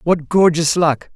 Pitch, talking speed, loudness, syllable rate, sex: 165 Hz, 155 wpm, -15 LUFS, 3.9 syllables/s, female